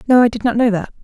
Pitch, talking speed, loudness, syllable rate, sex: 230 Hz, 350 wpm, -15 LUFS, 7.5 syllables/s, female